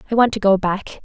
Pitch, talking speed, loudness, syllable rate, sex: 205 Hz, 290 wpm, -17 LUFS, 6.2 syllables/s, female